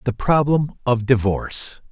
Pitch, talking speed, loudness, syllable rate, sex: 125 Hz, 125 wpm, -19 LUFS, 4.5 syllables/s, male